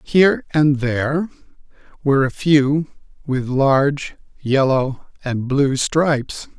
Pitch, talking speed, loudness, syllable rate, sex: 140 Hz, 110 wpm, -18 LUFS, 3.7 syllables/s, male